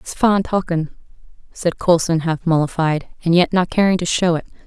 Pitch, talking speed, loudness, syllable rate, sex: 170 Hz, 180 wpm, -18 LUFS, 5.1 syllables/s, female